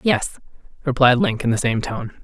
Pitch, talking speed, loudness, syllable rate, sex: 145 Hz, 190 wpm, -19 LUFS, 4.9 syllables/s, female